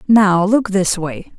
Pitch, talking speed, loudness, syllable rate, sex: 195 Hz, 175 wpm, -15 LUFS, 3.3 syllables/s, female